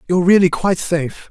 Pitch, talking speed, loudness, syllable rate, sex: 175 Hz, 185 wpm, -16 LUFS, 7.1 syllables/s, male